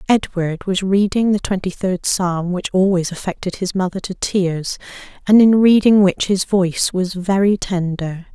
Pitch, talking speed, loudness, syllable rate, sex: 185 Hz, 165 wpm, -17 LUFS, 4.5 syllables/s, female